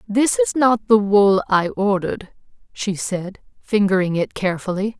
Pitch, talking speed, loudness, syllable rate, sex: 200 Hz, 145 wpm, -19 LUFS, 4.6 syllables/s, female